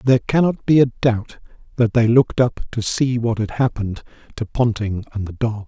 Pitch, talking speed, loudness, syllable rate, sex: 115 Hz, 200 wpm, -19 LUFS, 5.3 syllables/s, male